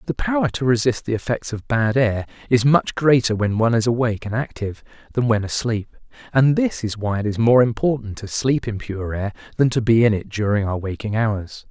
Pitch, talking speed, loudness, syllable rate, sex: 115 Hz, 220 wpm, -20 LUFS, 5.5 syllables/s, male